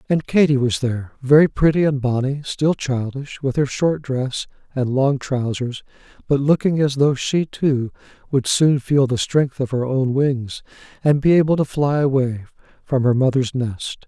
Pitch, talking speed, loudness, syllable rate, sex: 135 Hz, 180 wpm, -19 LUFS, 4.5 syllables/s, male